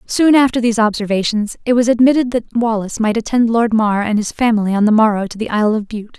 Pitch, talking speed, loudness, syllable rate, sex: 225 Hz, 235 wpm, -15 LUFS, 6.3 syllables/s, female